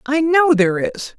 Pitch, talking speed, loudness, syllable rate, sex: 280 Hz, 200 wpm, -16 LUFS, 4.7 syllables/s, female